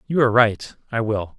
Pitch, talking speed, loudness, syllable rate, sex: 115 Hz, 175 wpm, -20 LUFS, 5.3 syllables/s, male